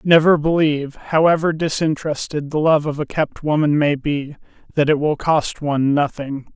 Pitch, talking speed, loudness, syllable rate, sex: 150 Hz, 165 wpm, -18 LUFS, 5.0 syllables/s, male